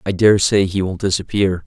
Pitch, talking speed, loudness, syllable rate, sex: 95 Hz, 180 wpm, -17 LUFS, 5.8 syllables/s, male